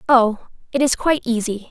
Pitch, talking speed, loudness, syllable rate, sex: 240 Hz, 175 wpm, -19 LUFS, 6.0 syllables/s, female